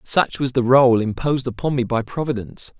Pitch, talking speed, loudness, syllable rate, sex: 125 Hz, 195 wpm, -19 LUFS, 5.6 syllables/s, male